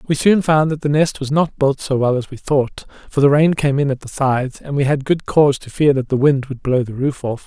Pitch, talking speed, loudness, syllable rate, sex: 140 Hz, 295 wpm, -17 LUFS, 5.5 syllables/s, male